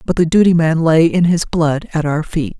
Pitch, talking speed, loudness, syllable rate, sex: 165 Hz, 255 wpm, -14 LUFS, 5.1 syllables/s, female